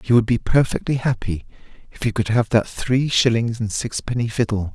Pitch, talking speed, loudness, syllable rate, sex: 115 Hz, 190 wpm, -20 LUFS, 5.2 syllables/s, male